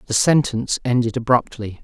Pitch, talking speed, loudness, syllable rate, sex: 120 Hz, 130 wpm, -19 LUFS, 5.7 syllables/s, male